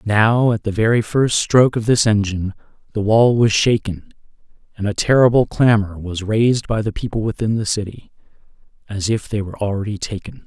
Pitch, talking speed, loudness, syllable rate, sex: 110 Hz, 180 wpm, -17 LUFS, 5.5 syllables/s, male